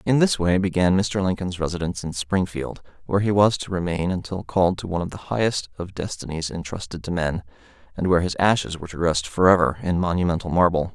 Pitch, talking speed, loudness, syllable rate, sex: 90 Hz, 205 wpm, -23 LUFS, 6.2 syllables/s, male